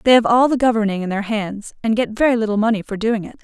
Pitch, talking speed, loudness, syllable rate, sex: 220 Hz, 280 wpm, -18 LUFS, 6.6 syllables/s, female